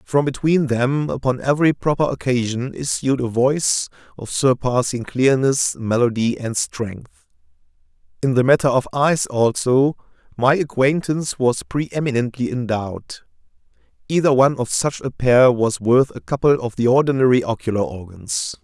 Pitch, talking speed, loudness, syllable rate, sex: 125 Hz, 140 wpm, -19 LUFS, 4.8 syllables/s, male